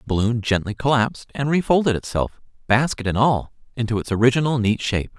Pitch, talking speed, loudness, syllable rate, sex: 120 Hz, 175 wpm, -21 LUFS, 6.3 syllables/s, male